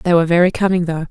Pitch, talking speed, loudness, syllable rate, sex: 175 Hz, 270 wpm, -15 LUFS, 8.2 syllables/s, female